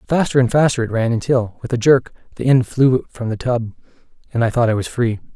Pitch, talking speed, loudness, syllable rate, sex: 120 Hz, 235 wpm, -18 LUFS, 5.7 syllables/s, male